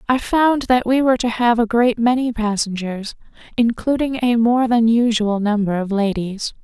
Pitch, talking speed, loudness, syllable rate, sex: 230 Hz, 170 wpm, -18 LUFS, 4.7 syllables/s, female